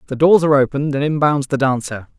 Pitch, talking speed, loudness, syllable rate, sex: 140 Hz, 245 wpm, -16 LUFS, 6.8 syllables/s, male